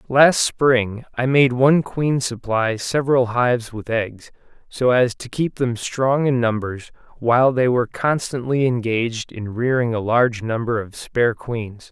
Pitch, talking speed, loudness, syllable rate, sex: 120 Hz, 160 wpm, -19 LUFS, 4.4 syllables/s, male